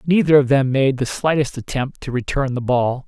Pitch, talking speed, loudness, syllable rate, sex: 135 Hz, 215 wpm, -18 LUFS, 5.1 syllables/s, male